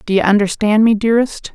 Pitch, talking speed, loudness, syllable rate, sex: 215 Hz, 195 wpm, -14 LUFS, 6.3 syllables/s, female